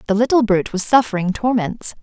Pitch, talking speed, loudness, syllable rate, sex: 215 Hz, 180 wpm, -17 LUFS, 6.1 syllables/s, female